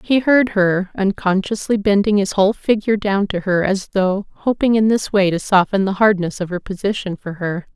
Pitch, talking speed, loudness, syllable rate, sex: 200 Hz, 200 wpm, -17 LUFS, 5.2 syllables/s, female